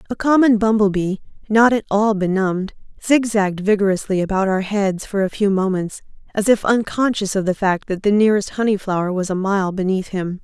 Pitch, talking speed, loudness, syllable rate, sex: 200 Hz, 185 wpm, -18 LUFS, 5.5 syllables/s, female